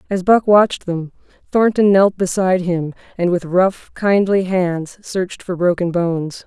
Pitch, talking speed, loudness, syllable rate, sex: 185 Hz, 160 wpm, -17 LUFS, 4.5 syllables/s, female